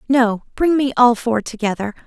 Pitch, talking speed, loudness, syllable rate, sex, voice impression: 240 Hz, 175 wpm, -17 LUFS, 4.9 syllables/s, female, very feminine, slightly adult-like, slightly cute, friendly, kind